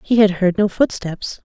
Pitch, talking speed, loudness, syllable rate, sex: 200 Hz, 200 wpm, -18 LUFS, 4.5 syllables/s, female